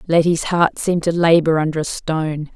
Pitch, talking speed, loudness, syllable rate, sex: 165 Hz, 190 wpm, -17 LUFS, 5.5 syllables/s, female